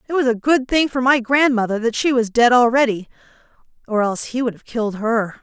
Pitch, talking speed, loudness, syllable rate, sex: 240 Hz, 220 wpm, -18 LUFS, 5.9 syllables/s, female